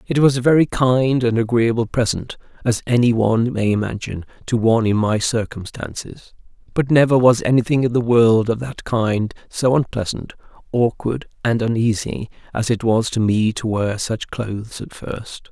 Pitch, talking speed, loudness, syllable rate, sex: 115 Hz, 170 wpm, -19 LUFS, 4.9 syllables/s, male